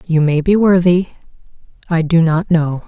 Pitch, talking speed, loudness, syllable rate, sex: 170 Hz, 165 wpm, -14 LUFS, 4.6 syllables/s, female